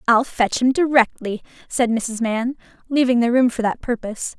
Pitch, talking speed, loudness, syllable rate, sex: 240 Hz, 180 wpm, -20 LUFS, 4.9 syllables/s, female